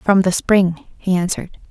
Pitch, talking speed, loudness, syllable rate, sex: 185 Hz, 175 wpm, -18 LUFS, 4.7 syllables/s, female